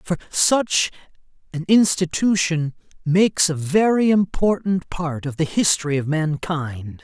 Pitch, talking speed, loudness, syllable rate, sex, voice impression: 170 Hz, 120 wpm, -20 LUFS, 4.1 syllables/s, male, masculine, adult-like, slightly powerful, slightly friendly, slightly unique